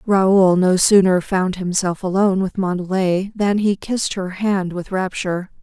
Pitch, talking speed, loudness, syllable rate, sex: 190 Hz, 160 wpm, -18 LUFS, 4.4 syllables/s, female